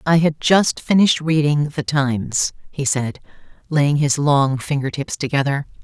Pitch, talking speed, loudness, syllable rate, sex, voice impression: 145 Hz, 155 wpm, -18 LUFS, 4.5 syllables/s, female, feminine, middle-aged, tensed, slightly hard, clear, fluent, intellectual, slightly calm, unique, elegant, slightly strict, slightly sharp